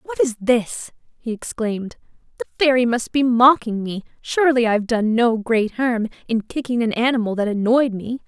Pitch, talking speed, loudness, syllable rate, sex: 230 Hz, 175 wpm, -19 LUFS, 5.1 syllables/s, female